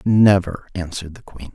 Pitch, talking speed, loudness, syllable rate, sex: 95 Hz, 155 wpm, -18 LUFS, 5.0 syllables/s, male